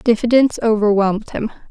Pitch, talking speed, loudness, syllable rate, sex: 220 Hz, 105 wpm, -16 LUFS, 6.1 syllables/s, female